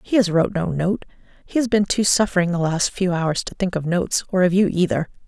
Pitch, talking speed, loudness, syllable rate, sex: 185 Hz, 250 wpm, -20 LUFS, 5.9 syllables/s, female